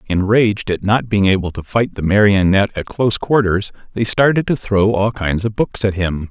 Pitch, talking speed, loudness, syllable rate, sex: 105 Hz, 210 wpm, -16 LUFS, 5.3 syllables/s, male